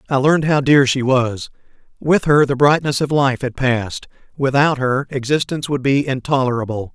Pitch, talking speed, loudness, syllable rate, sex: 135 Hz, 175 wpm, -17 LUFS, 5.2 syllables/s, male